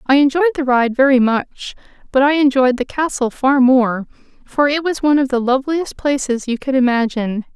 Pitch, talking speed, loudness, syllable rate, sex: 265 Hz, 190 wpm, -16 LUFS, 5.4 syllables/s, female